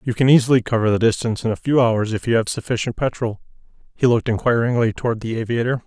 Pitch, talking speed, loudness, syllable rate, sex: 115 Hz, 215 wpm, -19 LUFS, 6.9 syllables/s, male